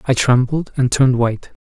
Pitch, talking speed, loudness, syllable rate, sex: 125 Hz, 185 wpm, -16 LUFS, 5.9 syllables/s, male